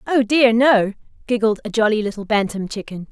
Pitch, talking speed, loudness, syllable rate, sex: 225 Hz, 175 wpm, -18 LUFS, 5.4 syllables/s, female